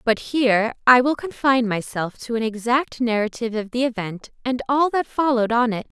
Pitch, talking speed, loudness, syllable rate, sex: 240 Hz, 190 wpm, -21 LUFS, 5.5 syllables/s, female